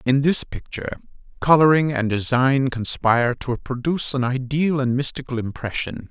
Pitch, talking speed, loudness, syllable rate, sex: 130 Hz, 140 wpm, -21 LUFS, 5.1 syllables/s, male